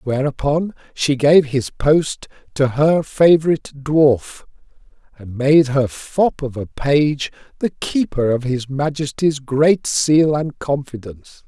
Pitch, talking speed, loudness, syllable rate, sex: 140 Hz, 130 wpm, -17 LUFS, 3.6 syllables/s, male